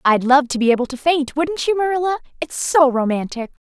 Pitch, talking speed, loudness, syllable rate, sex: 285 Hz, 210 wpm, -18 LUFS, 5.6 syllables/s, female